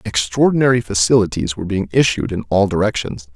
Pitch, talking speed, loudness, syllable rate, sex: 100 Hz, 145 wpm, -17 LUFS, 6.1 syllables/s, male